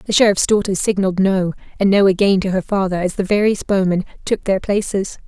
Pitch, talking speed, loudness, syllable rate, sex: 195 Hz, 205 wpm, -17 LUFS, 5.9 syllables/s, female